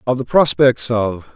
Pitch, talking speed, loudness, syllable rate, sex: 125 Hz, 175 wpm, -16 LUFS, 4.2 syllables/s, male